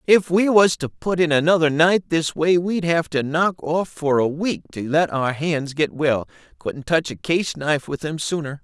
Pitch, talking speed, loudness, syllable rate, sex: 160 Hz, 220 wpm, -20 LUFS, 4.5 syllables/s, male